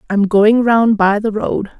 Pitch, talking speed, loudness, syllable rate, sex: 215 Hz, 200 wpm, -13 LUFS, 4.0 syllables/s, female